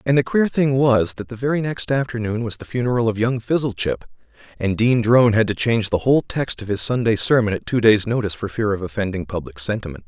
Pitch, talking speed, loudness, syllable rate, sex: 115 Hz, 230 wpm, -20 LUFS, 6.2 syllables/s, male